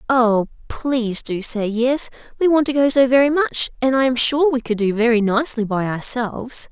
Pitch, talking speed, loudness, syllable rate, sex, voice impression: 245 Hz, 195 wpm, -18 LUFS, 4.9 syllables/s, female, feminine, young, soft, slightly fluent, cute, refreshing, friendly